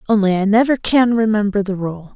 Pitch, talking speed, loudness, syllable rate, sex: 210 Hz, 195 wpm, -16 LUFS, 5.6 syllables/s, female